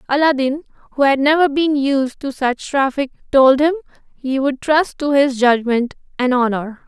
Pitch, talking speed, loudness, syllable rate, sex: 275 Hz, 165 wpm, -16 LUFS, 4.6 syllables/s, female